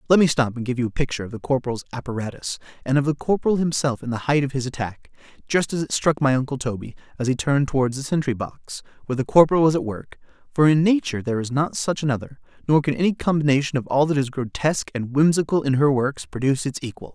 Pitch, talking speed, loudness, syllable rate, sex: 135 Hz, 230 wpm, -22 LUFS, 6.8 syllables/s, male